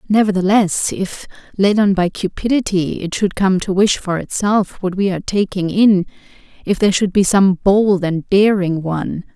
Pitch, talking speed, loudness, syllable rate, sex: 195 Hz, 165 wpm, -16 LUFS, 4.8 syllables/s, female